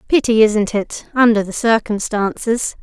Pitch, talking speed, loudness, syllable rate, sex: 220 Hz, 125 wpm, -16 LUFS, 4.3 syllables/s, female